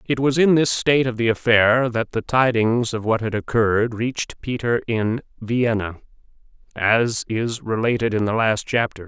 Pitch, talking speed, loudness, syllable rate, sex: 115 Hz, 170 wpm, -20 LUFS, 4.7 syllables/s, male